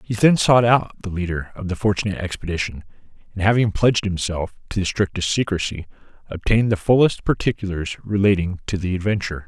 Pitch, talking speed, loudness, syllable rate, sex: 100 Hz, 165 wpm, -20 LUFS, 6.2 syllables/s, male